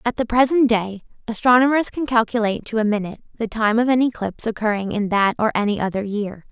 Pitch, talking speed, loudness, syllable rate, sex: 225 Hz, 205 wpm, -19 LUFS, 6.2 syllables/s, female